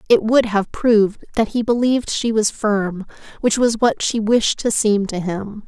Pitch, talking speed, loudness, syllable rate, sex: 220 Hz, 190 wpm, -18 LUFS, 4.4 syllables/s, female